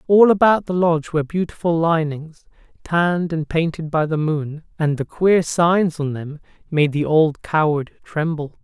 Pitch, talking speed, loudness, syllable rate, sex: 160 Hz, 165 wpm, -19 LUFS, 4.5 syllables/s, male